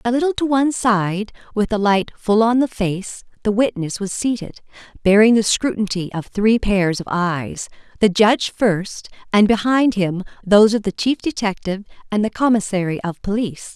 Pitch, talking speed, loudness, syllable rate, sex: 210 Hz, 170 wpm, -18 LUFS, 4.9 syllables/s, female